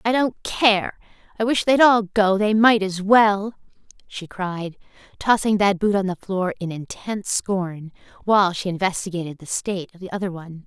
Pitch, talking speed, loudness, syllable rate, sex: 195 Hz, 180 wpm, -20 LUFS, 4.9 syllables/s, female